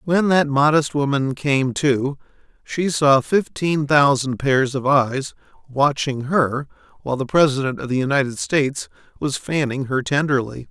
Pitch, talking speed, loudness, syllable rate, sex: 140 Hz, 145 wpm, -19 LUFS, 4.4 syllables/s, male